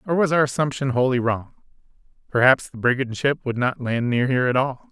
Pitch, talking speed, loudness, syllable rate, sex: 130 Hz, 210 wpm, -21 LUFS, 5.8 syllables/s, male